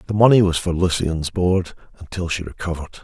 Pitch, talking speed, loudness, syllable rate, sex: 90 Hz, 180 wpm, -19 LUFS, 6.1 syllables/s, male